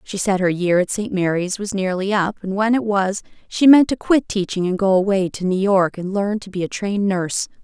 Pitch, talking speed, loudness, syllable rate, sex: 195 Hz, 250 wpm, -19 LUFS, 5.3 syllables/s, female